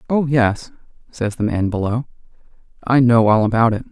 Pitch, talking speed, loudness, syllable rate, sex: 115 Hz, 170 wpm, -17 LUFS, 5.2 syllables/s, male